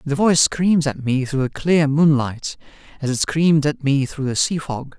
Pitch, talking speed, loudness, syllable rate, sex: 145 Hz, 215 wpm, -19 LUFS, 4.7 syllables/s, male